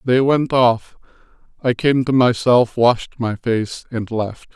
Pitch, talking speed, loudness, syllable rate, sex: 120 Hz, 160 wpm, -18 LUFS, 3.5 syllables/s, male